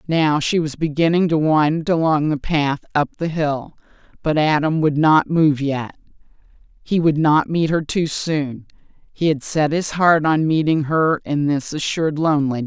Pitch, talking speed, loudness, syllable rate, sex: 155 Hz, 175 wpm, -18 LUFS, 4.5 syllables/s, female